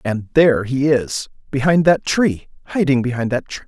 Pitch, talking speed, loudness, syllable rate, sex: 135 Hz, 145 wpm, -17 LUFS, 4.9 syllables/s, male